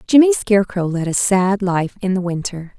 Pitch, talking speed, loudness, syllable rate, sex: 195 Hz, 195 wpm, -17 LUFS, 5.0 syllables/s, female